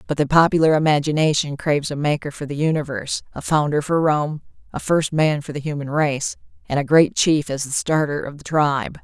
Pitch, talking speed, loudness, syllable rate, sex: 150 Hz, 205 wpm, -20 LUFS, 5.6 syllables/s, female